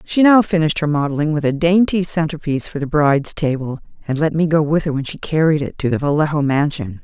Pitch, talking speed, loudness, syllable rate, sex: 150 Hz, 230 wpm, -17 LUFS, 6.2 syllables/s, female